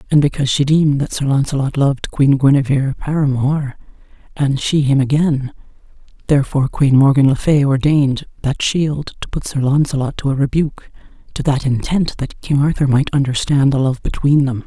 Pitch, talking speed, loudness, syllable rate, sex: 140 Hz, 170 wpm, -16 LUFS, 5.5 syllables/s, female